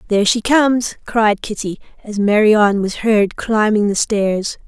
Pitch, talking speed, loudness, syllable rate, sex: 215 Hz, 155 wpm, -16 LUFS, 4.4 syllables/s, female